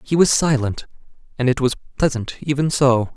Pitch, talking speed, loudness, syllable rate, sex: 135 Hz, 170 wpm, -19 LUFS, 5.3 syllables/s, male